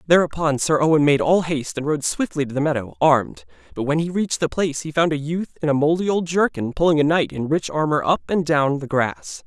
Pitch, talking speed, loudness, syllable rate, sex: 155 Hz, 245 wpm, -20 LUFS, 5.9 syllables/s, male